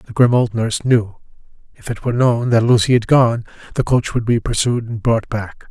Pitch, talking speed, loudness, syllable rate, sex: 115 Hz, 220 wpm, -17 LUFS, 5.2 syllables/s, male